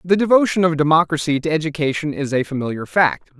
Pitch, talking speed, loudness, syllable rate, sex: 155 Hz, 175 wpm, -18 LUFS, 6.2 syllables/s, male